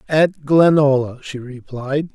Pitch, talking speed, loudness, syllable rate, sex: 140 Hz, 110 wpm, -16 LUFS, 3.7 syllables/s, male